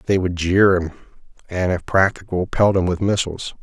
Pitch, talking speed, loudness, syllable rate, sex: 95 Hz, 180 wpm, -19 LUFS, 5.7 syllables/s, male